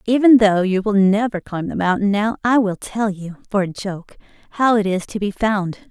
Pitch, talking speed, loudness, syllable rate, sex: 205 Hz, 225 wpm, -18 LUFS, 4.9 syllables/s, female